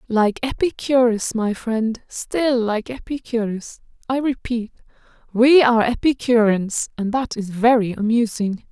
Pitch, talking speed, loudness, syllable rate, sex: 230 Hz, 115 wpm, -20 LUFS, 4.1 syllables/s, female